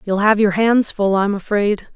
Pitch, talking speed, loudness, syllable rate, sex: 205 Hz, 215 wpm, -17 LUFS, 4.4 syllables/s, female